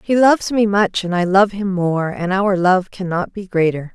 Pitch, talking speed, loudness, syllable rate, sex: 190 Hz, 230 wpm, -17 LUFS, 4.7 syllables/s, female